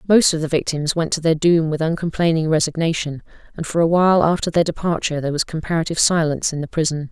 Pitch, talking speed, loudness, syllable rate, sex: 160 Hz, 210 wpm, -19 LUFS, 6.8 syllables/s, female